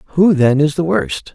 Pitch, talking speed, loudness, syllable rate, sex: 160 Hz, 225 wpm, -14 LUFS, 3.8 syllables/s, male